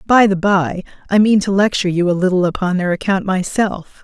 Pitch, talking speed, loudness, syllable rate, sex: 190 Hz, 210 wpm, -16 LUFS, 5.5 syllables/s, female